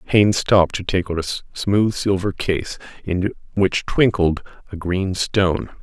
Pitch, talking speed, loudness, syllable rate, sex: 95 Hz, 155 wpm, -20 LUFS, 4.3 syllables/s, male